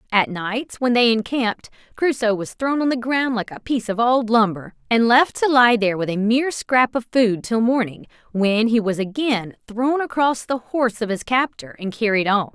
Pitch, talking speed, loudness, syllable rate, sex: 230 Hz, 210 wpm, -20 LUFS, 5.0 syllables/s, female